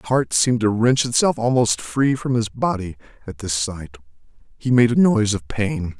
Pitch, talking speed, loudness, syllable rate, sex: 115 Hz, 200 wpm, -19 LUFS, 5.0 syllables/s, male